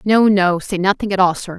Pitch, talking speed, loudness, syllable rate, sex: 190 Hz, 265 wpm, -16 LUFS, 5.2 syllables/s, female